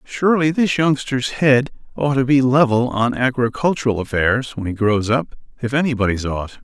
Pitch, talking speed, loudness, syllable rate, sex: 125 Hz, 165 wpm, -18 LUFS, 5.0 syllables/s, male